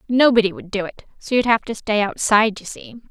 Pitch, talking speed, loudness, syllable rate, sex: 220 Hz, 230 wpm, -18 LUFS, 6.0 syllables/s, female